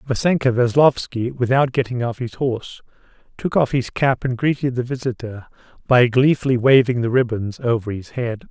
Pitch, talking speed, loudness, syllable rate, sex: 125 Hz, 160 wpm, -19 LUFS, 5.1 syllables/s, male